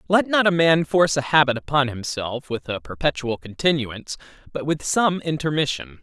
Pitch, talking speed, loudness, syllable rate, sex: 140 Hz, 170 wpm, -21 LUFS, 5.3 syllables/s, male